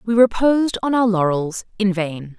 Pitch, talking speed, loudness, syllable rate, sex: 205 Hz, 150 wpm, -19 LUFS, 4.7 syllables/s, female